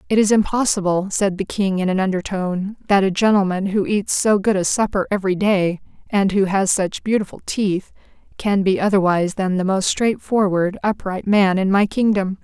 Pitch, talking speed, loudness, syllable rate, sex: 195 Hz, 185 wpm, -19 LUFS, 5.2 syllables/s, female